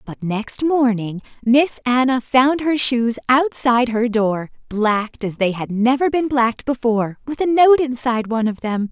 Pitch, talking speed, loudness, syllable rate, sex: 245 Hz, 175 wpm, -18 LUFS, 4.7 syllables/s, female